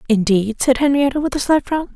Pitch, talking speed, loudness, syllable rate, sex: 265 Hz, 215 wpm, -17 LUFS, 5.7 syllables/s, female